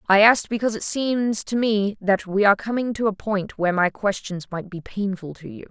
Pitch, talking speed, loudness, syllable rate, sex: 205 Hz, 230 wpm, -22 LUFS, 5.5 syllables/s, female